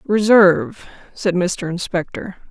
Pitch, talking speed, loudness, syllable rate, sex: 190 Hz, 95 wpm, -17 LUFS, 3.9 syllables/s, female